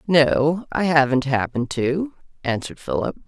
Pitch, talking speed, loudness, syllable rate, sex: 150 Hz, 130 wpm, -21 LUFS, 4.7 syllables/s, female